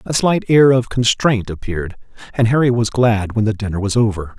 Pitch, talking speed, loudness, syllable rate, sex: 115 Hz, 205 wpm, -16 LUFS, 5.5 syllables/s, male